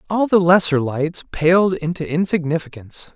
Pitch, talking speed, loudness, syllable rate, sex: 165 Hz, 135 wpm, -18 LUFS, 4.9 syllables/s, male